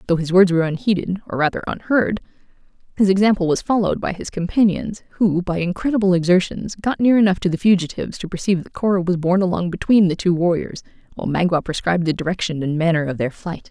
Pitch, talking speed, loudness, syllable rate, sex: 180 Hz, 200 wpm, -19 LUFS, 6.6 syllables/s, female